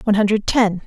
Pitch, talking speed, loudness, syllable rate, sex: 210 Hz, 210 wpm, -17 LUFS, 6.9 syllables/s, female